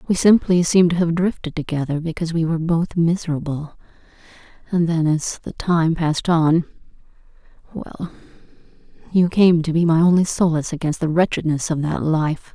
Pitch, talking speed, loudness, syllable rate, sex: 165 Hz, 155 wpm, -19 LUFS, 5.5 syllables/s, female